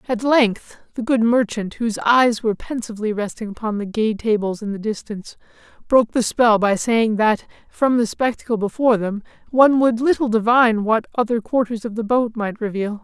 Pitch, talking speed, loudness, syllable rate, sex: 225 Hz, 185 wpm, -19 LUFS, 5.4 syllables/s, male